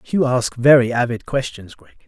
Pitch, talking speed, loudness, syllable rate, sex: 125 Hz, 175 wpm, -17 LUFS, 4.8 syllables/s, male